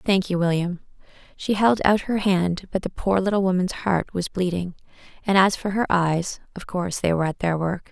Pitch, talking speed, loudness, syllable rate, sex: 185 Hz, 210 wpm, -23 LUFS, 5.2 syllables/s, female